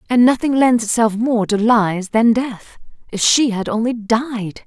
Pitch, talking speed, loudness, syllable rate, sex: 230 Hz, 180 wpm, -16 LUFS, 4.1 syllables/s, female